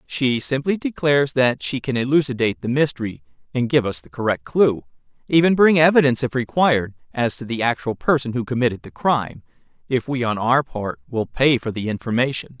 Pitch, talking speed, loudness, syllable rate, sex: 130 Hz, 175 wpm, -20 LUFS, 5.7 syllables/s, male